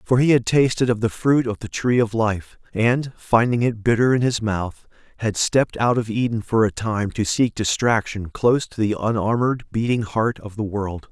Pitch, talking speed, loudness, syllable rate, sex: 115 Hz, 210 wpm, -21 LUFS, 5.0 syllables/s, male